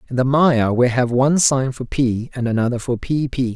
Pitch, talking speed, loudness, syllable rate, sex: 130 Hz, 235 wpm, -18 LUFS, 5.1 syllables/s, male